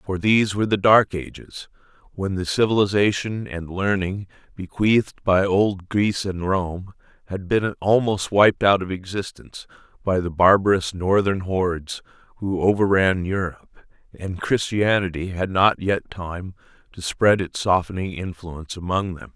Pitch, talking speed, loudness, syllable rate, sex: 95 Hz, 140 wpm, -21 LUFS, 4.5 syllables/s, male